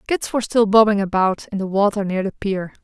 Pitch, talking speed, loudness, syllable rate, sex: 205 Hz, 235 wpm, -19 LUFS, 5.8 syllables/s, female